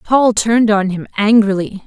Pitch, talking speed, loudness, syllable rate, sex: 210 Hz, 160 wpm, -14 LUFS, 4.8 syllables/s, female